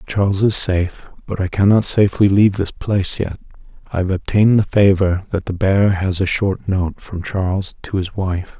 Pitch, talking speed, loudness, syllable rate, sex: 95 Hz, 195 wpm, -17 LUFS, 5.2 syllables/s, male